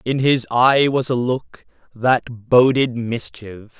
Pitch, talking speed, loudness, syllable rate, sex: 120 Hz, 140 wpm, -18 LUFS, 3.3 syllables/s, male